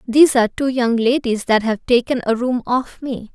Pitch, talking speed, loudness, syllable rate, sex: 245 Hz, 215 wpm, -17 LUFS, 5.1 syllables/s, female